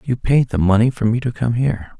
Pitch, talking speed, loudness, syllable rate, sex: 115 Hz, 270 wpm, -17 LUFS, 6.0 syllables/s, male